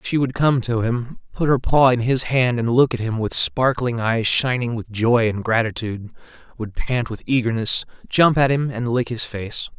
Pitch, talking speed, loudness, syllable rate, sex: 120 Hz, 210 wpm, -20 LUFS, 4.7 syllables/s, male